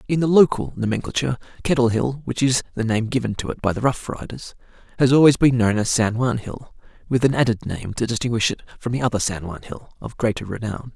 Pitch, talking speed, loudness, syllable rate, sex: 120 Hz, 225 wpm, -21 LUFS, 6.2 syllables/s, male